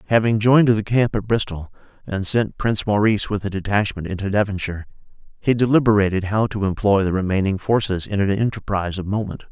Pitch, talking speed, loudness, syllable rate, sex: 105 Hz, 175 wpm, -20 LUFS, 6.2 syllables/s, male